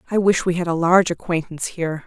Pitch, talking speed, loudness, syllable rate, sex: 175 Hz, 235 wpm, -20 LUFS, 7.0 syllables/s, female